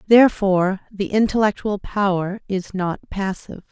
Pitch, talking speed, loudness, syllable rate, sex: 195 Hz, 115 wpm, -20 LUFS, 5.0 syllables/s, female